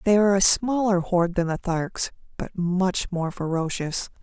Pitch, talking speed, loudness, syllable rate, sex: 185 Hz, 170 wpm, -23 LUFS, 4.6 syllables/s, female